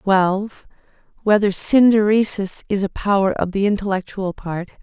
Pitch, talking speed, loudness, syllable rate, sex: 200 Hz, 125 wpm, -19 LUFS, 5.3 syllables/s, female